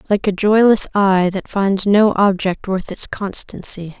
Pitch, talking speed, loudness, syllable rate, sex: 195 Hz, 165 wpm, -16 LUFS, 4.1 syllables/s, female